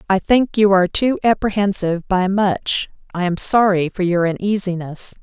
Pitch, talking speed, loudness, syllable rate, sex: 190 Hz, 160 wpm, -17 LUFS, 4.9 syllables/s, female